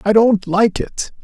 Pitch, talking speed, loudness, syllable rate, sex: 205 Hz, 195 wpm, -16 LUFS, 3.8 syllables/s, male